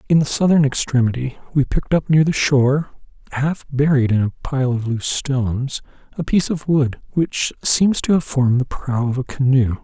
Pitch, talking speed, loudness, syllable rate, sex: 135 Hz, 195 wpm, -18 LUFS, 5.2 syllables/s, male